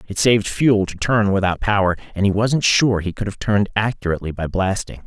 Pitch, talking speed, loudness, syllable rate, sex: 100 Hz, 215 wpm, -19 LUFS, 5.8 syllables/s, male